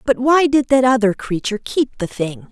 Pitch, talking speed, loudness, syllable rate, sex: 240 Hz, 215 wpm, -17 LUFS, 5.2 syllables/s, female